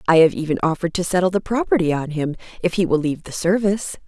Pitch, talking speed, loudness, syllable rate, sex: 175 Hz, 235 wpm, -20 LUFS, 7.0 syllables/s, female